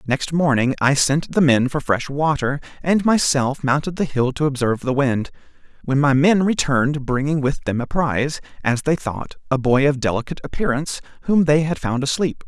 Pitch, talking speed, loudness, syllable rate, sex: 140 Hz, 190 wpm, -19 LUFS, 5.3 syllables/s, male